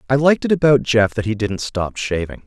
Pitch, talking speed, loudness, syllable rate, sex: 120 Hz, 245 wpm, -18 LUFS, 5.7 syllables/s, male